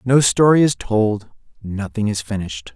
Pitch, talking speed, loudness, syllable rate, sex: 115 Hz, 150 wpm, -18 LUFS, 4.7 syllables/s, male